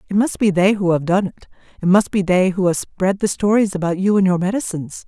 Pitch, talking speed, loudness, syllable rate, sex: 190 Hz, 250 wpm, -18 LUFS, 6.0 syllables/s, female